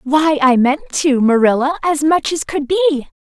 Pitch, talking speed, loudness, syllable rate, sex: 290 Hz, 185 wpm, -15 LUFS, 4.5 syllables/s, female